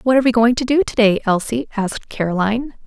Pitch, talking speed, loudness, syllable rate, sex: 230 Hz, 230 wpm, -17 LUFS, 6.8 syllables/s, female